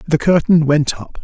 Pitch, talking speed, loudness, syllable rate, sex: 155 Hz, 195 wpm, -14 LUFS, 4.6 syllables/s, male